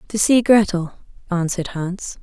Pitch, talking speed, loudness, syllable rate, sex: 190 Hz, 135 wpm, -19 LUFS, 4.7 syllables/s, female